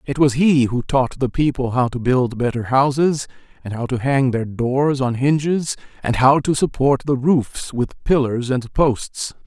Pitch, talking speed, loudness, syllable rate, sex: 130 Hz, 190 wpm, -19 LUFS, 4.2 syllables/s, male